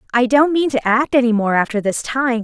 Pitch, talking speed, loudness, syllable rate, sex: 245 Hz, 245 wpm, -16 LUFS, 5.6 syllables/s, female